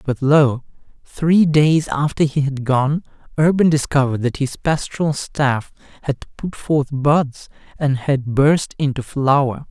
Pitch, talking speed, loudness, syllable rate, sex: 140 Hz, 140 wpm, -18 LUFS, 3.9 syllables/s, male